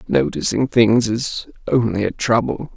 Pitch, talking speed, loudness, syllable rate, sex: 105 Hz, 130 wpm, -18 LUFS, 4.2 syllables/s, male